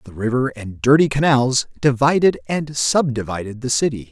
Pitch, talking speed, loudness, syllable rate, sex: 130 Hz, 145 wpm, -18 LUFS, 4.9 syllables/s, male